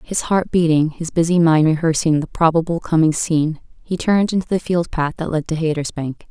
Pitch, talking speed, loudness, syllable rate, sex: 165 Hz, 200 wpm, -18 LUFS, 5.6 syllables/s, female